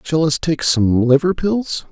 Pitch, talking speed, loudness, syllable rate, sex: 155 Hz, 190 wpm, -16 LUFS, 3.9 syllables/s, male